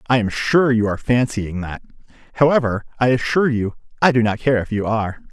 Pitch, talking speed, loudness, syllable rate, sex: 115 Hz, 205 wpm, -19 LUFS, 6.1 syllables/s, male